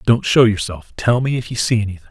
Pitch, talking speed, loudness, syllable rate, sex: 110 Hz, 255 wpm, -17 LUFS, 6.3 syllables/s, male